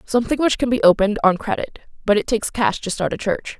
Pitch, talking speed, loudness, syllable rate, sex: 215 Hz, 250 wpm, -19 LUFS, 6.5 syllables/s, female